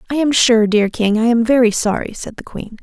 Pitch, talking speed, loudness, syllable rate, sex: 230 Hz, 255 wpm, -14 LUFS, 5.5 syllables/s, female